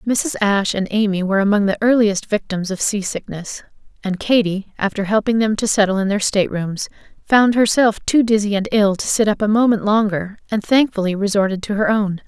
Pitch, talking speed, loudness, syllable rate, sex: 205 Hz, 195 wpm, -17 LUFS, 5.5 syllables/s, female